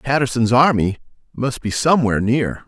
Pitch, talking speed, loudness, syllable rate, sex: 125 Hz, 135 wpm, -18 LUFS, 5.4 syllables/s, male